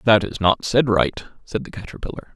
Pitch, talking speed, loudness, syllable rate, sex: 105 Hz, 205 wpm, -20 LUFS, 5.5 syllables/s, male